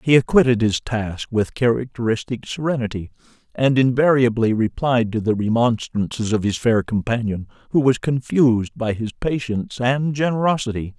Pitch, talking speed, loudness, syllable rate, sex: 120 Hz, 135 wpm, -20 LUFS, 5.0 syllables/s, male